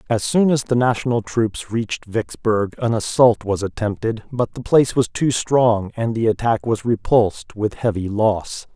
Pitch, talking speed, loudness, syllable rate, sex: 115 Hz, 180 wpm, -19 LUFS, 4.6 syllables/s, male